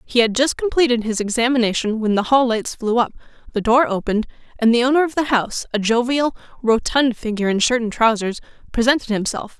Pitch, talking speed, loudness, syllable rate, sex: 235 Hz, 195 wpm, -19 LUFS, 6.1 syllables/s, female